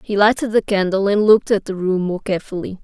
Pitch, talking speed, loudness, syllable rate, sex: 200 Hz, 235 wpm, -17 LUFS, 6.3 syllables/s, female